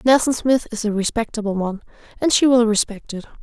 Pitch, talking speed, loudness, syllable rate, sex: 225 Hz, 175 wpm, -19 LUFS, 5.7 syllables/s, female